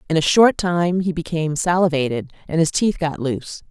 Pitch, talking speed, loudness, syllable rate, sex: 165 Hz, 195 wpm, -19 LUFS, 5.5 syllables/s, female